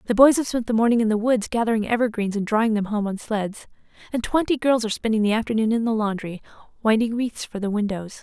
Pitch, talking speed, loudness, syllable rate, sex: 220 Hz, 235 wpm, -22 LUFS, 6.4 syllables/s, female